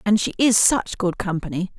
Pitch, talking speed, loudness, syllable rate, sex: 200 Hz, 200 wpm, -20 LUFS, 5.0 syllables/s, female